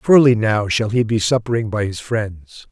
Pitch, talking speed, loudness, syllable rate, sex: 110 Hz, 200 wpm, -17 LUFS, 5.1 syllables/s, male